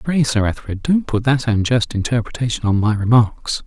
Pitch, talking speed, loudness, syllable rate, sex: 115 Hz, 180 wpm, -18 LUFS, 5.3 syllables/s, male